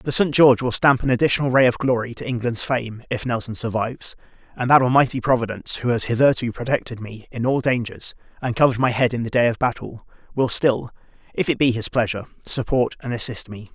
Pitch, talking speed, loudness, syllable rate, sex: 120 Hz, 210 wpm, -20 LUFS, 6.2 syllables/s, male